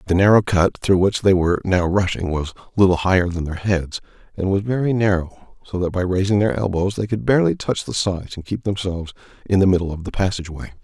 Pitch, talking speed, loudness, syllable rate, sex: 95 Hz, 225 wpm, -20 LUFS, 6.2 syllables/s, male